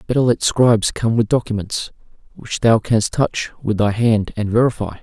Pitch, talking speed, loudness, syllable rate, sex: 110 Hz, 180 wpm, -18 LUFS, 4.9 syllables/s, male